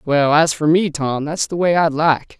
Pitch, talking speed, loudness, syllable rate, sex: 155 Hz, 250 wpm, -17 LUFS, 4.4 syllables/s, male